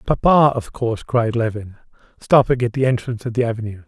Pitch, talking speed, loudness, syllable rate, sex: 120 Hz, 185 wpm, -18 LUFS, 6.1 syllables/s, male